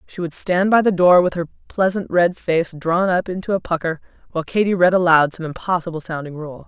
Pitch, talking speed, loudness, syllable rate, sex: 175 Hz, 215 wpm, -18 LUFS, 5.7 syllables/s, female